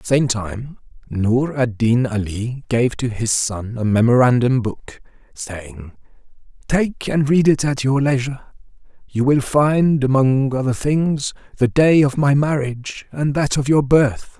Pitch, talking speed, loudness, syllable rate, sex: 130 Hz, 165 wpm, -18 LUFS, 4.0 syllables/s, male